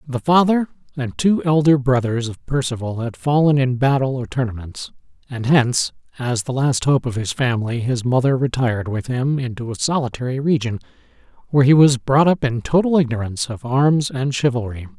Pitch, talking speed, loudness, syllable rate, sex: 130 Hz, 175 wpm, -19 LUFS, 5.4 syllables/s, male